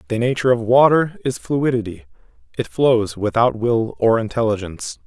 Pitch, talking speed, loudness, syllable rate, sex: 120 Hz, 140 wpm, -18 LUFS, 5.2 syllables/s, male